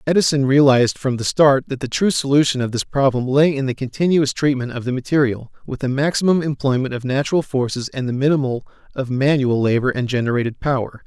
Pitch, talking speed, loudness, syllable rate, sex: 135 Hz, 195 wpm, -18 LUFS, 6.1 syllables/s, male